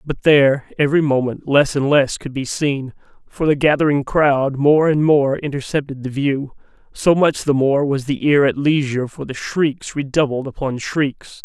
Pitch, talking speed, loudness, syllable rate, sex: 140 Hz, 180 wpm, -17 LUFS, 4.7 syllables/s, male